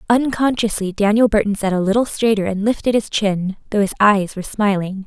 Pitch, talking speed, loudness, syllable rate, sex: 210 Hz, 180 wpm, -18 LUFS, 5.5 syllables/s, female